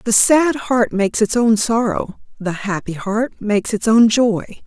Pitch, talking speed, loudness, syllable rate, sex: 220 Hz, 180 wpm, -17 LUFS, 4.1 syllables/s, female